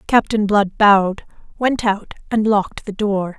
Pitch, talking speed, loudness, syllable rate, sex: 205 Hz, 160 wpm, -17 LUFS, 4.3 syllables/s, female